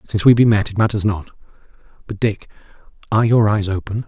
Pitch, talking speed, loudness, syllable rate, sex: 105 Hz, 190 wpm, -17 LUFS, 6.8 syllables/s, male